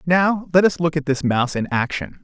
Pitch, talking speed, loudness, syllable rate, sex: 160 Hz, 240 wpm, -19 LUFS, 5.3 syllables/s, male